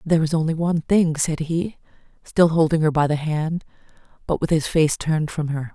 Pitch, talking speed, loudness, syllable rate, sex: 160 Hz, 210 wpm, -21 LUFS, 5.4 syllables/s, female